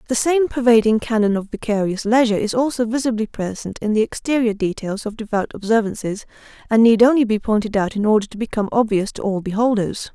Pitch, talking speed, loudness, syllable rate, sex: 220 Hz, 190 wpm, -19 LUFS, 6.1 syllables/s, female